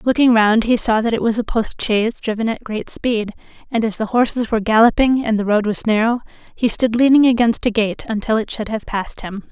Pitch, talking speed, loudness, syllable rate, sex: 225 Hz, 235 wpm, -17 LUFS, 5.7 syllables/s, female